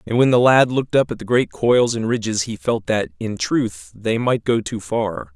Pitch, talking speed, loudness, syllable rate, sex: 110 Hz, 245 wpm, -19 LUFS, 4.8 syllables/s, male